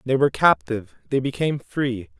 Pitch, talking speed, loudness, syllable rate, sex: 135 Hz, 165 wpm, -22 LUFS, 6.0 syllables/s, male